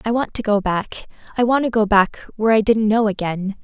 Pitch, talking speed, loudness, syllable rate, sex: 215 Hz, 215 wpm, -18 LUFS, 5.5 syllables/s, female